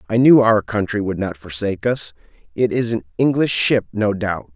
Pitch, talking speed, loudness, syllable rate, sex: 105 Hz, 200 wpm, -18 LUFS, 5.1 syllables/s, male